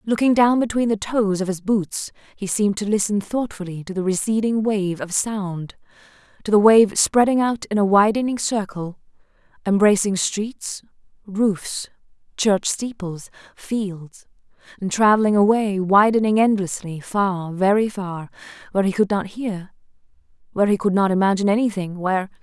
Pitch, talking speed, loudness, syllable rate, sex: 205 Hz, 135 wpm, -20 LUFS, 4.8 syllables/s, female